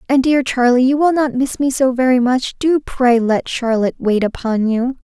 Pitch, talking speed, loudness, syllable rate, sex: 255 Hz, 215 wpm, -16 LUFS, 4.8 syllables/s, female